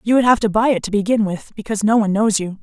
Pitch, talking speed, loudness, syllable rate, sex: 210 Hz, 320 wpm, -17 LUFS, 7.3 syllables/s, female